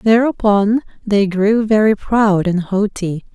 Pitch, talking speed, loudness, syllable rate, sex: 205 Hz, 125 wpm, -15 LUFS, 3.7 syllables/s, female